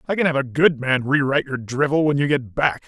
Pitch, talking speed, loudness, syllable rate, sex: 140 Hz, 270 wpm, -20 LUFS, 6.0 syllables/s, male